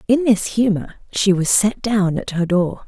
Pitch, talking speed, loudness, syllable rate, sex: 200 Hz, 210 wpm, -18 LUFS, 4.3 syllables/s, female